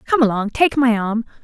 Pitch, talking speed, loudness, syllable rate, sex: 240 Hz, 210 wpm, -17 LUFS, 5.2 syllables/s, female